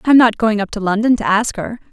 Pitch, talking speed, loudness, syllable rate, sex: 220 Hz, 280 wpm, -15 LUFS, 5.8 syllables/s, female